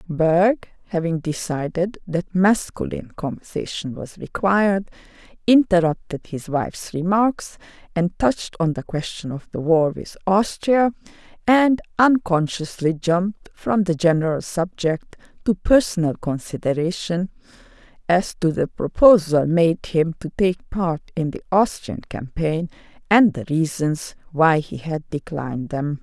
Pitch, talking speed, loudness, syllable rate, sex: 175 Hz, 120 wpm, -21 LUFS, 4.2 syllables/s, female